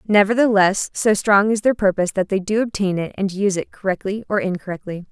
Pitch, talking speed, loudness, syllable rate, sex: 200 Hz, 200 wpm, -19 LUFS, 6.0 syllables/s, female